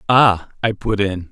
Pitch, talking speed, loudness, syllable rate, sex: 105 Hz, 180 wpm, -18 LUFS, 4.0 syllables/s, male